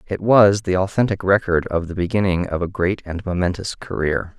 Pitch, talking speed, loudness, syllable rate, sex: 95 Hz, 190 wpm, -19 LUFS, 5.2 syllables/s, male